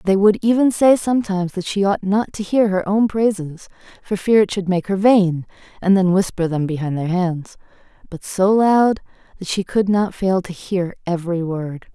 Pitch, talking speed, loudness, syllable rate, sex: 190 Hz, 200 wpm, -18 LUFS, 4.8 syllables/s, female